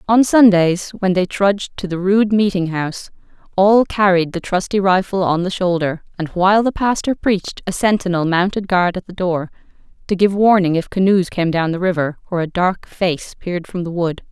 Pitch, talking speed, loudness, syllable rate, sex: 185 Hz, 195 wpm, -17 LUFS, 5.1 syllables/s, female